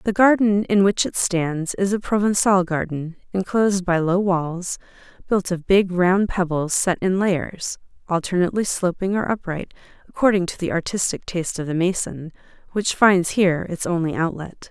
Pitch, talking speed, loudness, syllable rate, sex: 185 Hz, 165 wpm, -21 LUFS, 4.8 syllables/s, female